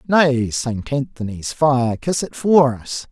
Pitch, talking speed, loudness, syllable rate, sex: 135 Hz, 155 wpm, -19 LUFS, 3.4 syllables/s, male